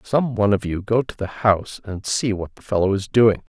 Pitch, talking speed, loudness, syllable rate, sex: 105 Hz, 255 wpm, -21 LUFS, 5.4 syllables/s, male